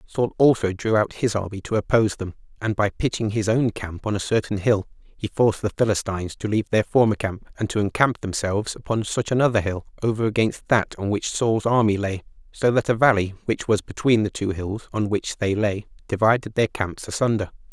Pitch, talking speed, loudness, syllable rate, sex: 105 Hz, 210 wpm, -22 LUFS, 5.5 syllables/s, male